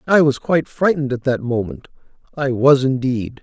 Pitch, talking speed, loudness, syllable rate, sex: 135 Hz, 175 wpm, -18 LUFS, 5.4 syllables/s, male